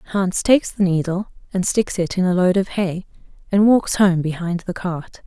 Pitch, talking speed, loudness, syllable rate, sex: 185 Hz, 205 wpm, -19 LUFS, 4.9 syllables/s, female